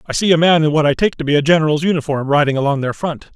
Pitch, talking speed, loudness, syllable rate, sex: 155 Hz, 305 wpm, -15 LUFS, 7.1 syllables/s, male